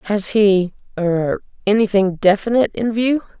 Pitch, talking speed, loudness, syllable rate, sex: 205 Hz, 90 wpm, -17 LUFS, 4.7 syllables/s, female